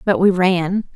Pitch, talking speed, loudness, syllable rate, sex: 180 Hz, 190 wpm, -17 LUFS, 3.7 syllables/s, female